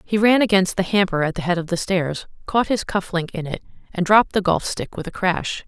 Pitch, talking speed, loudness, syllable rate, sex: 185 Hz, 265 wpm, -20 LUFS, 5.5 syllables/s, female